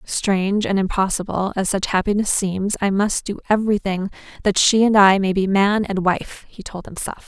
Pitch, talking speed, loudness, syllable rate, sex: 195 Hz, 190 wpm, -19 LUFS, 5.0 syllables/s, female